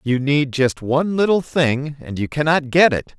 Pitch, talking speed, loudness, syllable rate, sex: 145 Hz, 205 wpm, -18 LUFS, 4.8 syllables/s, male